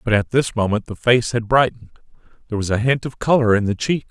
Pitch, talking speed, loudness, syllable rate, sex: 115 Hz, 250 wpm, -19 LUFS, 6.5 syllables/s, male